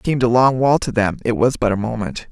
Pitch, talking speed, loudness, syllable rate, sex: 135 Hz, 285 wpm, -17 LUFS, 6.8 syllables/s, female